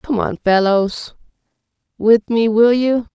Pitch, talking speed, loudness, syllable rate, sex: 220 Hz, 135 wpm, -15 LUFS, 3.6 syllables/s, female